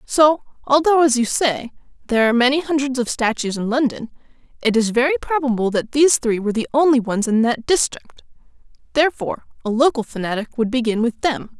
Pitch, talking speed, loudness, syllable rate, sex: 255 Hz, 180 wpm, -18 LUFS, 6.1 syllables/s, female